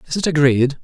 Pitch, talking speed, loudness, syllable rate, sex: 145 Hz, 215 wpm, -16 LUFS, 6.6 syllables/s, male